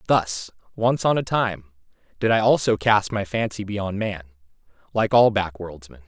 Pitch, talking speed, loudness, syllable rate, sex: 100 Hz, 160 wpm, -22 LUFS, 4.5 syllables/s, male